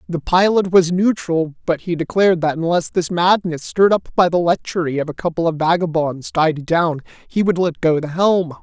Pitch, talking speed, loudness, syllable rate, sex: 170 Hz, 200 wpm, -17 LUFS, 5.1 syllables/s, male